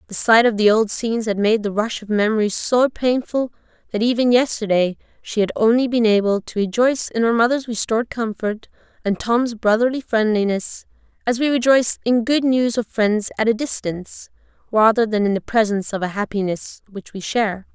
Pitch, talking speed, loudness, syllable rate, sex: 225 Hz, 185 wpm, -19 LUFS, 5.4 syllables/s, female